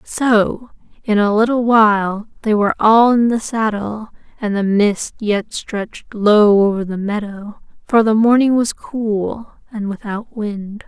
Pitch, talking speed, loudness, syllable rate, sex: 215 Hz, 155 wpm, -16 LUFS, 3.9 syllables/s, female